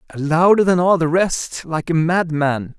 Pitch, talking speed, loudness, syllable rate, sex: 165 Hz, 175 wpm, -17 LUFS, 4.0 syllables/s, male